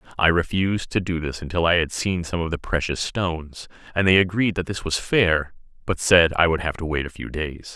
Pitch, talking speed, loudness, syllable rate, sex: 85 Hz, 240 wpm, -22 LUFS, 5.5 syllables/s, male